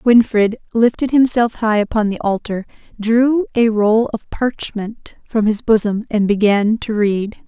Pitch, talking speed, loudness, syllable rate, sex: 220 Hz, 150 wpm, -16 LUFS, 4.1 syllables/s, female